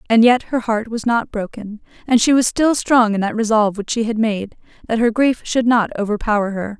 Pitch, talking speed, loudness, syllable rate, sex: 225 Hz, 230 wpm, -17 LUFS, 5.4 syllables/s, female